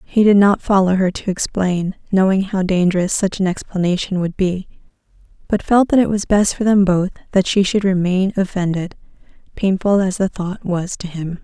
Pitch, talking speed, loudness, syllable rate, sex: 190 Hz, 190 wpm, -17 LUFS, 5.0 syllables/s, female